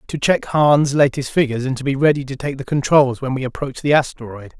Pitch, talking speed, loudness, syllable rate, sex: 135 Hz, 220 wpm, -17 LUFS, 6.1 syllables/s, male